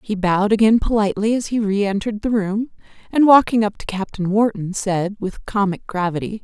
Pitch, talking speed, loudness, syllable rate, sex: 205 Hz, 175 wpm, -19 LUFS, 5.4 syllables/s, female